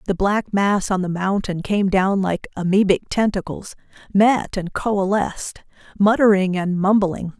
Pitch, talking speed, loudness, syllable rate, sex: 195 Hz, 140 wpm, -19 LUFS, 4.4 syllables/s, female